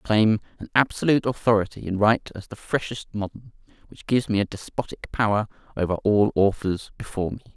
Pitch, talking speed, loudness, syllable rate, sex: 105 Hz, 175 wpm, -24 LUFS, 6.2 syllables/s, male